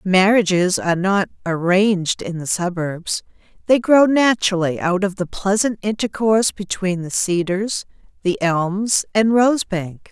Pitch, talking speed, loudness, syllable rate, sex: 195 Hz, 135 wpm, -18 LUFS, 4.3 syllables/s, female